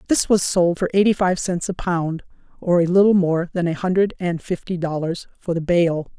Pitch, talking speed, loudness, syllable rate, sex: 175 Hz, 215 wpm, -20 LUFS, 5.0 syllables/s, female